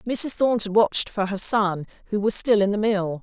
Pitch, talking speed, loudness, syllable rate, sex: 205 Hz, 225 wpm, -21 LUFS, 4.8 syllables/s, female